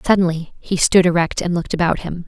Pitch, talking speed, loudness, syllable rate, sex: 175 Hz, 210 wpm, -17 LUFS, 6.3 syllables/s, female